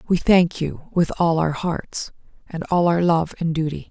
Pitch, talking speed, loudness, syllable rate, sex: 165 Hz, 200 wpm, -21 LUFS, 4.3 syllables/s, female